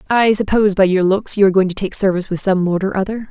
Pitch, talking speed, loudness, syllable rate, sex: 195 Hz, 290 wpm, -15 LUFS, 7.1 syllables/s, female